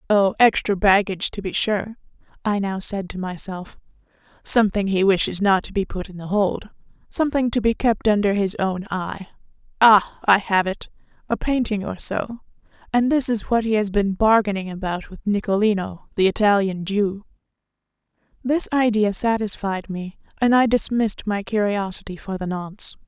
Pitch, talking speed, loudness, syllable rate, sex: 205 Hz, 150 wpm, -21 LUFS, 5.0 syllables/s, female